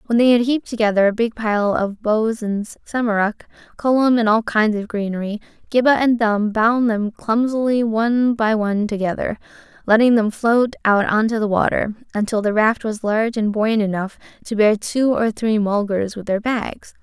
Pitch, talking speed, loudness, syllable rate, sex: 220 Hz, 185 wpm, -18 LUFS, 4.9 syllables/s, female